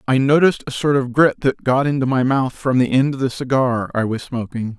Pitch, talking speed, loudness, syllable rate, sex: 130 Hz, 250 wpm, -18 LUFS, 5.6 syllables/s, male